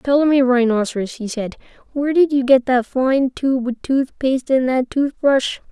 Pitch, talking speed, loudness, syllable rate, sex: 260 Hz, 190 wpm, -18 LUFS, 4.6 syllables/s, female